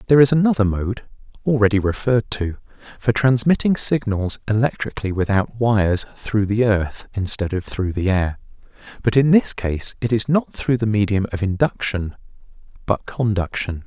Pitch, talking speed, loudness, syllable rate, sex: 110 Hz, 150 wpm, -20 LUFS, 4.6 syllables/s, male